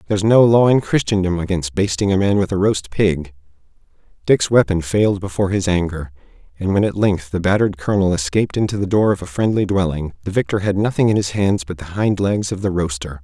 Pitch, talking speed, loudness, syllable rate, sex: 95 Hz, 220 wpm, -18 LUFS, 6.1 syllables/s, male